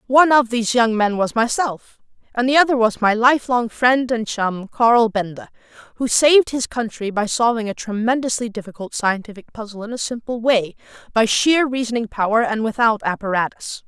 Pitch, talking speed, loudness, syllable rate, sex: 230 Hz, 175 wpm, -18 LUFS, 5.3 syllables/s, female